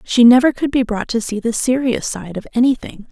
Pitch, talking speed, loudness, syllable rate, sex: 240 Hz, 230 wpm, -16 LUFS, 5.5 syllables/s, female